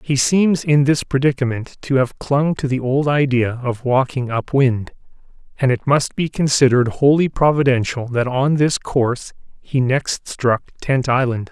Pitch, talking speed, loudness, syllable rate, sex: 135 Hz, 165 wpm, -18 LUFS, 4.5 syllables/s, male